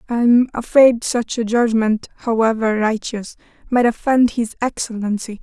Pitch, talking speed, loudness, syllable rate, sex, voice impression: 230 Hz, 135 wpm, -17 LUFS, 4.6 syllables/s, female, feminine, slightly young, slightly soft, slightly calm, friendly, slightly reassuring, slightly kind